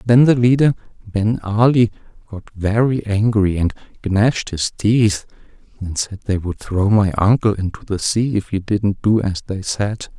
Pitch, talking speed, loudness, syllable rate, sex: 105 Hz, 170 wpm, -18 LUFS, 4.4 syllables/s, male